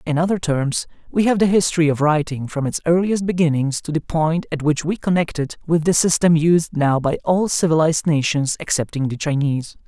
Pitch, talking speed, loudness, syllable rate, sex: 160 Hz, 200 wpm, -19 LUFS, 5.4 syllables/s, male